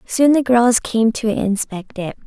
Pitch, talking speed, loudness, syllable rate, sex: 230 Hz, 185 wpm, -16 LUFS, 3.8 syllables/s, female